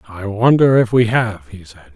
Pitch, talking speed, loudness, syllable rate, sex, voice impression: 105 Hz, 215 wpm, -14 LUFS, 4.5 syllables/s, male, very masculine, very adult-like, old, very thick, slightly relaxed, slightly weak, slightly dark, hard, very muffled, raspy, very cool, very intellectual, sincere, very calm, very mature, friendly, reassuring, slightly unique, elegant, slightly sweet, slightly lively, slightly strict, slightly intense